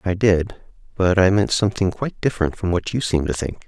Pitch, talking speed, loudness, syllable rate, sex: 95 Hz, 230 wpm, -20 LUFS, 5.9 syllables/s, male